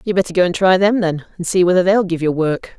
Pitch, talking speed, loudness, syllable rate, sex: 180 Hz, 300 wpm, -16 LUFS, 6.2 syllables/s, female